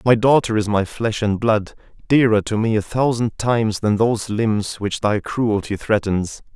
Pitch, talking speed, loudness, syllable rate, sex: 110 Hz, 185 wpm, -19 LUFS, 4.5 syllables/s, male